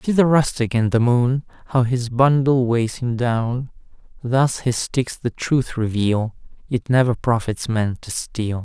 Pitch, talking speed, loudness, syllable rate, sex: 120 Hz, 165 wpm, -20 LUFS, 4.0 syllables/s, male